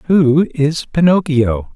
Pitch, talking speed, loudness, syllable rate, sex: 150 Hz, 105 wpm, -14 LUFS, 3.4 syllables/s, male